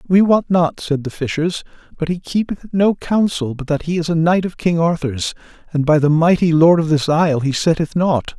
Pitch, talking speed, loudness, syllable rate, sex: 165 Hz, 230 wpm, -17 LUFS, 5.2 syllables/s, male